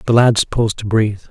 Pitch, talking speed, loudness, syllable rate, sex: 110 Hz, 230 wpm, -16 LUFS, 6.4 syllables/s, male